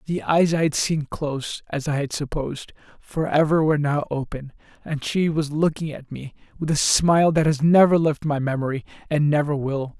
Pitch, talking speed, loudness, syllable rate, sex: 150 Hz, 190 wpm, -22 LUFS, 5.2 syllables/s, male